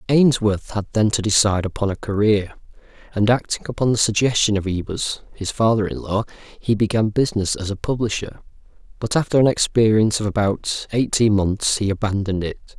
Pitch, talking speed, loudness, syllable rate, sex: 105 Hz, 170 wpm, -20 LUFS, 5.5 syllables/s, male